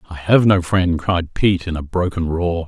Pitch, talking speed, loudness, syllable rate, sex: 85 Hz, 225 wpm, -18 LUFS, 4.9 syllables/s, male